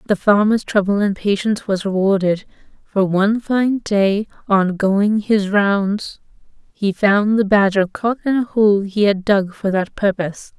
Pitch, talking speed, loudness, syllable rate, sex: 205 Hz, 165 wpm, -17 LUFS, 4.2 syllables/s, female